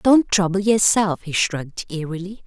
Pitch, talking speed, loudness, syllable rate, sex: 190 Hz, 145 wpm, -19 LUFS, 4.6 syllables/s, female